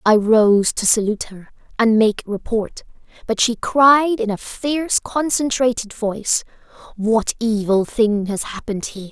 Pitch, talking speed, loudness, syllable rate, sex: 225 Hz, 140 wpm, -18 LUFS, 4.4 syllables/s, female